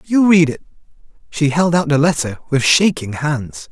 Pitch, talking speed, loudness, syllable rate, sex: 150 Hz, 180 wpm, -15 LUFS, 4.6 syllables/s, male